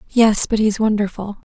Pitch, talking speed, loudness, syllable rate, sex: 210 Hz, 160 wpm, -17 LUFS, 5.0 syllables/s, female